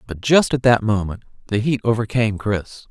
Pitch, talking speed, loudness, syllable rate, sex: 110 Hz, 185 wpm, -19 LUFS, 5.3 syllables/s, male